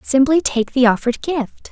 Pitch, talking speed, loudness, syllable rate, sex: 265 Hz, 175 wpm, -17 LUFS, 5.0 syllables/s, female